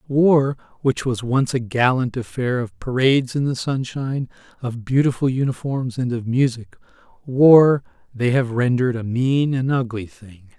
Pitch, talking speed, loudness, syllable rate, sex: 130 Hz, 155 wpm, -20 LUFS, 4.5 syllables/s, male